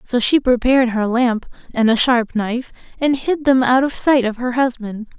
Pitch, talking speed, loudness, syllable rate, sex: 245 Hz, 210 wpm, -17 LUFS, 4.9 syllables/s, female